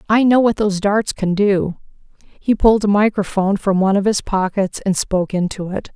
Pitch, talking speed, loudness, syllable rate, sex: 200 Hz, 200 wpm, -17 LUFS, 5.5 syllables/s, female